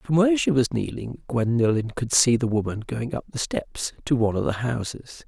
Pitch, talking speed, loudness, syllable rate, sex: 115 Hz, 215 wpm, -24 LUFS, 5.3 syllables/s, male